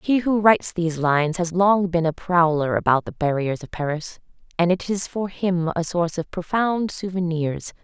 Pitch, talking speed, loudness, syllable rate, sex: 175 Hz, 190 wpm, -22 LUFS, 5.0 syllables/s, female